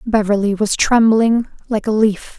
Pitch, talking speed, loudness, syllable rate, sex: 215 Hz, 150 wpm, -15 LUFS, 4.3 syllables/s, female